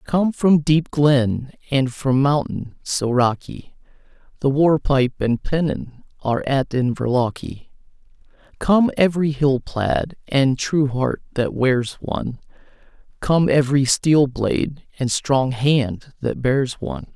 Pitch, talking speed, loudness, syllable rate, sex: 135 Hz, 130 wpm, -20 LUFS, 3.7 syllables/s, male